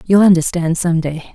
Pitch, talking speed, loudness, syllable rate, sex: 170 Hz, 180 wpm, -15 LUFS, 5.0 syllables/s, female